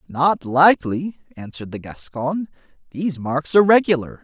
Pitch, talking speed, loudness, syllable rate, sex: 150 Hz, 130 wpm, -18 LUFS, 5.2 syllables/s, male